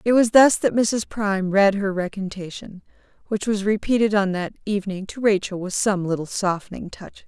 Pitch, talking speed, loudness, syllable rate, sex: 200 Hz, 180 wpm, -21 LUFS, 5.3 syllables/s, female